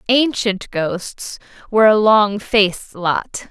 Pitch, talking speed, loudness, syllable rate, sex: 205 Hz, 120 wpm, -16 LUFS, 3.3 syllables/s, female